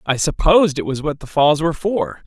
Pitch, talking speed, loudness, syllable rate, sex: 150 Hz, 240 wpm, -17 LUFS, 5.6 syllables/s, male